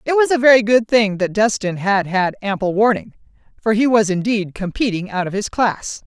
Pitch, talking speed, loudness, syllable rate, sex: 210 Hz, 205 wpm, -17 LUFS, 5.1 syllables/s, female